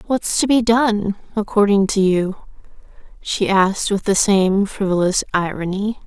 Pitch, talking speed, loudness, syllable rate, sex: 200 Hz, 140 wpm, -18 LUFS, 4.3 syllables/s, female